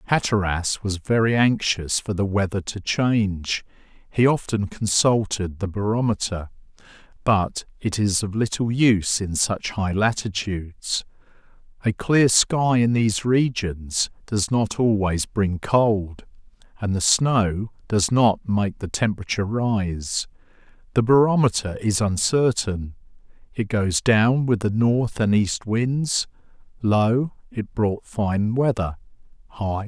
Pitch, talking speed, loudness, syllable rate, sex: 105 Hz, 135 wpm, -22 LUFS, 4.0 syllables/s, male